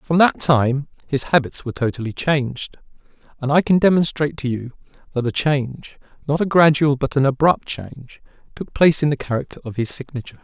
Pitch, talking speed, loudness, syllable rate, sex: 140 Hz, 175 wpm, -19 LUFS, 5.8 syllables/s, male